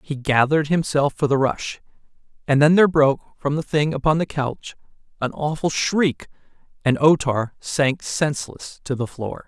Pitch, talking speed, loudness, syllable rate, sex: 145 Hz, 165 wpm, -20 LUFS, 4.8 syllables/s, male